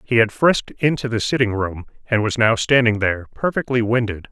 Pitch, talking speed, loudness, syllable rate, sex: 115 Hz, 195 wpm, -19 LUFS, 5.6 syllables/s, male